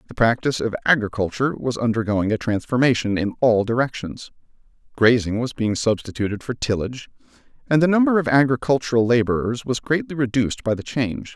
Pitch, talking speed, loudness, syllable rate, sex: 120 Hz, 155 wpm, -21 LUFS, 6.1 syllables/s, male